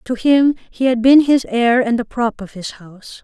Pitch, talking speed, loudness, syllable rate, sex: 240 Hz, 240 wpm, -15 LUFS, 4.8 syllables/s, female